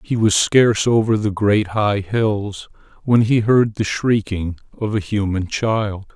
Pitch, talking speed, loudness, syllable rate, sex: 105 Hz, 165 wpm, -18 LUFS, 3.9 syllables/s, male